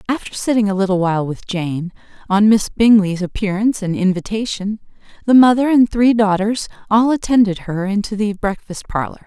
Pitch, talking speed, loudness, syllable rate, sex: 205 Hz, 160 wpm, -16 LUFS, 5.4 syllables/s, female